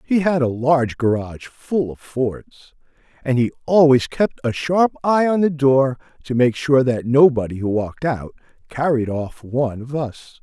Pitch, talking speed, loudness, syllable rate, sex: 135 Hz, 180 wpm, -19 LUFS, 4.6 syllables/s, male